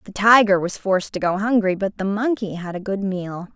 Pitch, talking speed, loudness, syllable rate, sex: 200 Hz, 235 wpm, -20 LUFS, 5.3 syllables/s, female